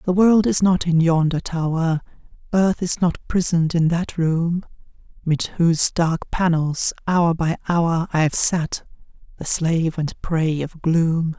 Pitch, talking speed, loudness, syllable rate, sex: 165 Hz, 155 wpm, -20 LUFS, 4.0 syllables/s, female